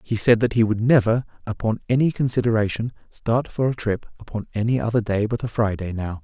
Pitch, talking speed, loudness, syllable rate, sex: 115 Hz, 200 wpm, -22 LUFS, 5.8 syllables/s, male